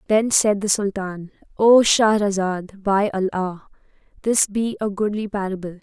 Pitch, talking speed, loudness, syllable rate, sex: 200 Hz, 135 wpm, -20 LUFS, 4.4 syllables/s, female